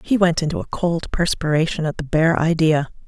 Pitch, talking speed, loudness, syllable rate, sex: 160 Hz, 195 wpm, -20 LUFS, 5.3 syllables/s, female